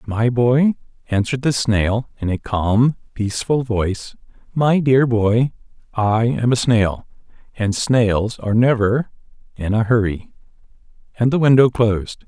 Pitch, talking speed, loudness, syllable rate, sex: 115 Hz, 135 wpm, -18 LUFS, 4.3 syllables/s, male